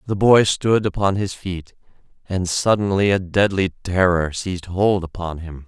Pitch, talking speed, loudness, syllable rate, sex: 95 Hz, 150 wpm, -19 LUFS, 4.5 syllables/s, male